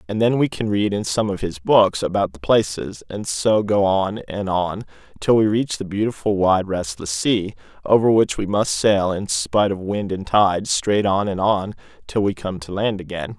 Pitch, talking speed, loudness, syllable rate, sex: 100 Hz, 215 wpm, -20 LUFS, 4.6 syllables/s, male